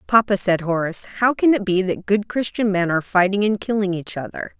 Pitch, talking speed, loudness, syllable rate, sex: 200 Hz, 220 wpm, -20 LUFS, 5.9 syllables/s, female